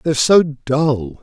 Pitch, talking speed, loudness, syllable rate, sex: 140 Hz, 145 wpm, -15 LUFS, 3.5 syllables/s, male